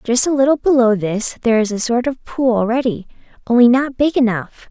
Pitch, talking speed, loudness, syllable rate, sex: 240 Hz, 205 wpm, -16 LUFS, 5.6 syllables/s, female